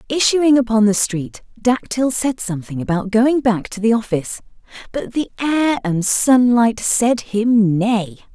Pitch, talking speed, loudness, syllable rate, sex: 225 Hz, 150 wpm, -17 LUFS, 4.3 syllables/s, female